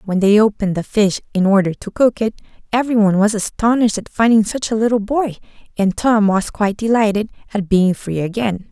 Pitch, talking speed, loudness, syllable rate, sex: 210 Hz, 195 wpm, -16 LUFS, 5.8 syllables/s, female